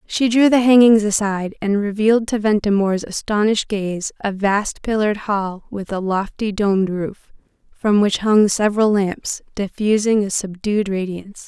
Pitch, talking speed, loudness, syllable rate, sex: 205 Hz, 150 wpm, -18 LUFS, 4.8 syllables/s, female